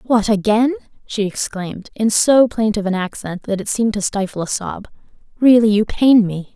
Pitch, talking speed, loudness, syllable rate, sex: 210 Hz, 185 wpm, -17 LUFS, 5.2 syllables/s, female